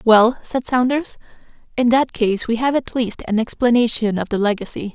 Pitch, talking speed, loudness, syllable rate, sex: 235 Hz, 180 wpm, -18 LUFS, 5.0 syllables/s, female